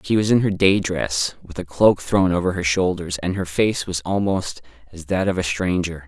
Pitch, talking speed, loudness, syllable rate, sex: 90 Hz, 225 wpm, -20 LUFS, 4.8 syllables/s, male